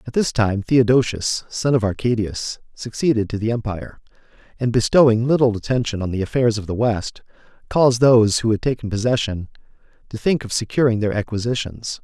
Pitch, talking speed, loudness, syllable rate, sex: 115 Hz, 165 wpm, -19 LUFS, 5.7 syllables/s, male